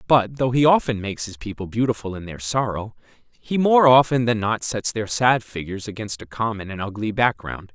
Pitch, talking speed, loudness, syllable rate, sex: 110 Hz, 200 wpm, -21 LUFS, 5.3 syllables/s, male